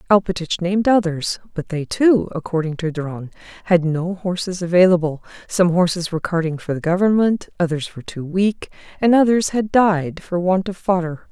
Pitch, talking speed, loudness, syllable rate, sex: 180 Hz, 170 wpm, -19 LUFS, 5.2 syllables/s, female